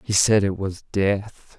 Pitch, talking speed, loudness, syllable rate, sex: 100 Hz, 190 wpm, -21 LUFS, 3.5 syllables/s, male